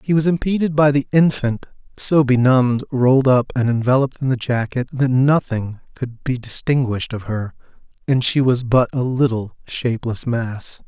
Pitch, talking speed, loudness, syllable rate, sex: 130 Hz, 165 wpm, -18 LUFS, 5.0 syllables/s, male